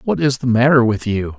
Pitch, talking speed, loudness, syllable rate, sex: 120 Hz, 260 wpm, -16 LUFS, 5.4 syllables/s, male